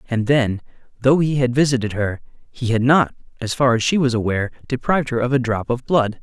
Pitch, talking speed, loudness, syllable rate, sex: 125 Hz, 220 wpm, -19 LUFS, 5.9 syllables/s, male